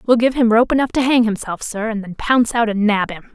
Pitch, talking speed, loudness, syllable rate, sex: 225 Hz, 285 wpm, -17 LUFS, 5.9 syllables/s, female